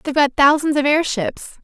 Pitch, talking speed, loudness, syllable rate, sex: 290 Hz, 185 wpm, -17 LUFS, 5.4 syllables/s, female